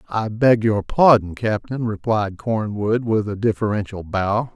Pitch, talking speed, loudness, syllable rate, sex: 110 Hz, 145 wpm, -20 LUFS, 4.2 syllables/s, male